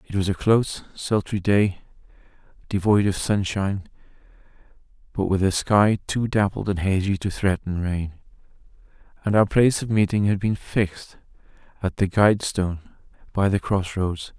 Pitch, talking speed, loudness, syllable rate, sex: 100 Hz, 150 wpm, -22 LUFS, 5.0 syllables/s, male